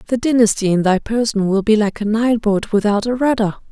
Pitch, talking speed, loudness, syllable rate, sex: 215 Hz, 225 wpm, -16 LUFS, 5.7 syllables/s, female